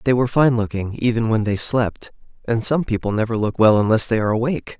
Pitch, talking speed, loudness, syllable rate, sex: 115 Hz, 225 wpm, -19 LUFS, 6.2 syllables/s, male